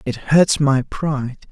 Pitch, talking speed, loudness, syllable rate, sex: 140 Hz, 160 wpm, -18 LUFS, 3.9 syllables/s, male